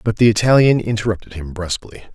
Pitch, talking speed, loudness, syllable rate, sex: 105 Hz, 170 wpm, -17 LUFS, 6.6 syllables/s, male